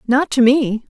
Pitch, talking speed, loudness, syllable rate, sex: 255 Hz, 190 wpm, -15 LUFS, 4.0 syllables/s, female